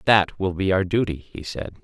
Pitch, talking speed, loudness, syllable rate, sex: 95 Hz, 230 wpm, -23 LUFS, 4.9 syllables/s, male